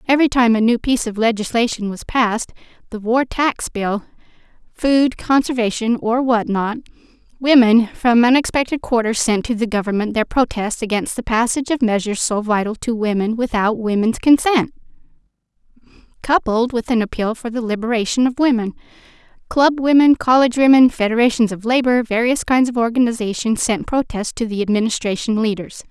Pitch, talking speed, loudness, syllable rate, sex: 235 Hz, 155 wpm, -17 LUFS, 5.5 syllables/s, female